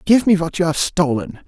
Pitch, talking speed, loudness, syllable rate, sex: 165 Hz, 245 wpm, -17 LUFS, 5.3 syllables/s, male